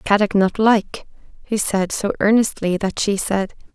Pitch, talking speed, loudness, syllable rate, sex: 205 Hz, 160 wpm, -19 LUFS, 4.2 syllables/s, female